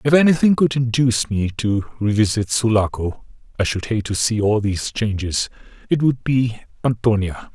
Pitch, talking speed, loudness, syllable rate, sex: 115 Hz, 160 wpm, -19 LUFS, 4.0 syllables/s, male